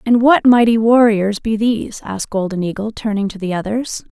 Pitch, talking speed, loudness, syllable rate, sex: 215 Hz, 190 wpm, -16 LUFS, 5.4 syllables/s, female